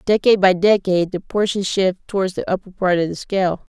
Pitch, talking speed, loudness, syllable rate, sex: 190 Hz, 210 wpm, -18 LUFS, 6.4 syllables/s, female